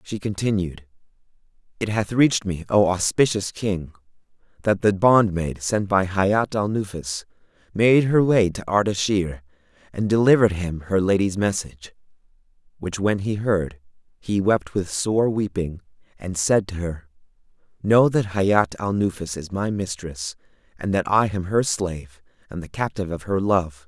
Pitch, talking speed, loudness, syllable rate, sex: 95 Hz, 155 wpm, -22 LUFS, 4.5 syllables/s, male